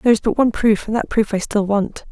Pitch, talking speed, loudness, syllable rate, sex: 215 Hz, 315 wpm, -18 LUFS, 6.4 syllables/s, female